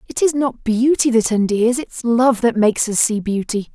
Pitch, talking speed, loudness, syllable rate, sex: 235 Hz, 210 wpm, -17 LUFS, 4.7 syllables/s, female